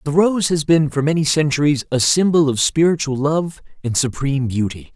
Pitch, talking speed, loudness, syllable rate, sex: 145 Hz, 180 wpm, -17 LUFS, 5.3 syllables/s, male